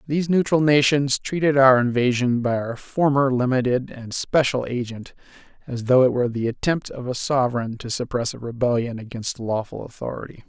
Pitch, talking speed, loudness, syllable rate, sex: 130 Hz, 165 wpm, -21 LUFS, 5.3 syllables/s, male